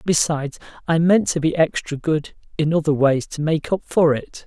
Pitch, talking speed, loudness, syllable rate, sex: 155 Hz, 200 wpm, -20 LUFS, 4.9 syllables/s, male